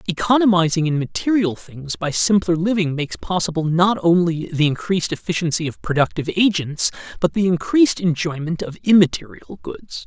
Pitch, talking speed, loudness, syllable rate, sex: 170 Hz, 145 wpm, -19 LUFS, 5.5 syllables/s, male